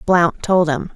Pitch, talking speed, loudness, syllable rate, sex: 170 Hz, 190 wpm, -17 LUFS, 3.7 syllables/s, female